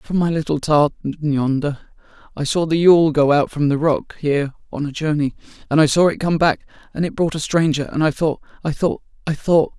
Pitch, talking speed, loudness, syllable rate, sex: 150 Hz, 210 wpm, -19 LUFS, 5.3 syllables/s, male